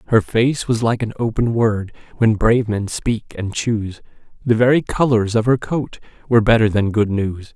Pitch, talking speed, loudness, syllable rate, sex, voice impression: 110 Hz, 190 wpm, -18 LUFS, 4.9 syllables/s, male, very masculine, very adult-like, slightly thick, cool, slightly sincere, calm